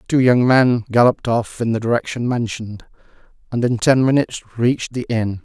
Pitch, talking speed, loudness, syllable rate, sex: 120 Hz, 190 wpm, -18 LUFS, 5.5 syllables/s, male